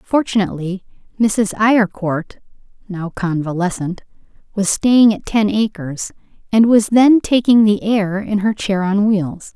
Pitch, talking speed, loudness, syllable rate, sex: 205 Hz, 130 wpm, -16 LUFS, 3.9 syllables/s, female